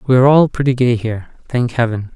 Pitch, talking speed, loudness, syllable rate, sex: 120 Hz, 220 wpm, -15 LUFS, 6.6 syllables/s, male